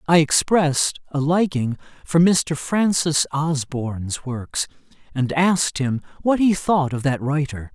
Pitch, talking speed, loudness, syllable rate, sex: 150 Hz, 140 wpm, -20 LUFS, 4.0 syllables/s, male